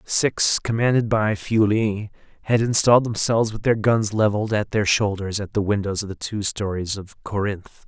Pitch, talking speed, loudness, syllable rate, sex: 105 Hz, 175 wpm, -21 LUFS, 5.3 syllables/s, male